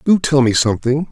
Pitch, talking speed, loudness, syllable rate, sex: 135 Hz, 215 wpm, -15 LUFS, 5.9 syllables/s, male